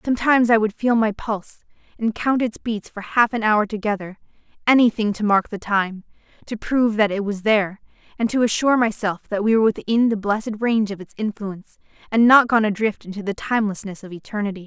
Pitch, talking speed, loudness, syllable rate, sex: 215 Hz, 195 wpm, -20 LUFS, 6.1 syllables/s, female